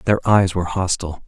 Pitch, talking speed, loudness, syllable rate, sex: 95 Hz, 190 wpm, -19 LUFS, 6.0 syllables/s, male